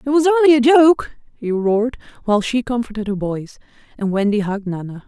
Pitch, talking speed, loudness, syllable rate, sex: 235 Hz, 190 wpm, -17 LUFS, 5.8 syllables/s, female